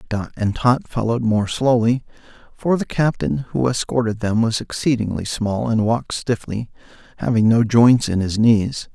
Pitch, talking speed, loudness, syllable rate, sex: 115 Hz, 160 wpm, -19 LUFS, 4.7 syllables/s, male